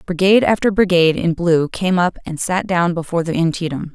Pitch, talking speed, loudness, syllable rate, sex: 175 Hz, 200 wpm, -17 LUFS, 5.9 syllables/s, female